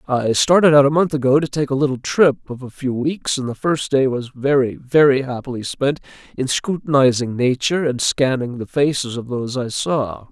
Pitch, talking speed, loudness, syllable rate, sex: 135 Hz, 205 wpm, -18 LUFS, 5.1 syllables/s, male